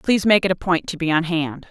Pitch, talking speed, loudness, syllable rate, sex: 175 Hz, 315 wpm, -19 LUFS, 6.3 syllables/s, female